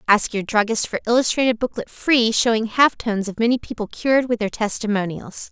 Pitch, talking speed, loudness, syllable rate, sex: 225 Hz, 185 wpm, -20 LUFS, 5.7 syllables/s, female